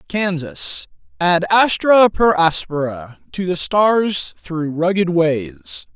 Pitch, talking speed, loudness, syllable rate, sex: 180 Hz, 100 wpm, -17 LUFS, 3.1 syllables/s, male